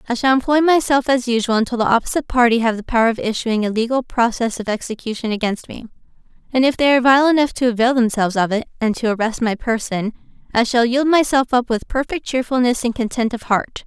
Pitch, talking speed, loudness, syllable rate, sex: 240 Hz, 215 wpm, -18 LUFS, 6.3 syllables/s, female